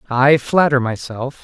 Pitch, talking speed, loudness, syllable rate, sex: 135 Hz, 125 wpm, -16 LUFS, 4.1 syllables/s, male